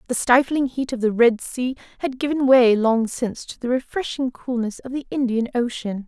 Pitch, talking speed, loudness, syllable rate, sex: 245 Hz, 200 wpm, -21 LUFS, 5.1 syllables/s, female